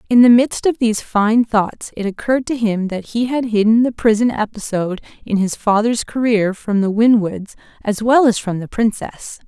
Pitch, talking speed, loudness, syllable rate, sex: 220 Hz, 195 wpm, -16 LUFS, 4.9 syllables/s, female